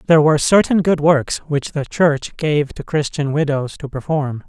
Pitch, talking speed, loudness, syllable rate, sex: 150 Hz, 190 wpm, -17 LUFS, 4.7 syllables/s, male